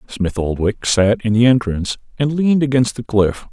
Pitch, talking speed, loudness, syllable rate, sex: 120 Hz, 190 wpm, -17 LUFS, 5.0 syllables/s, male